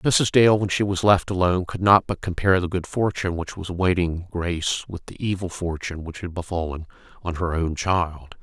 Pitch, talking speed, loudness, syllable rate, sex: 90 Hz, 205 wpm, -23 LUFS, 5.3 syllables/s, male